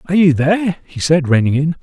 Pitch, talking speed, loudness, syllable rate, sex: 150 Hz, 230 wpm, -15 LUFS, 6.3 syllables/s, male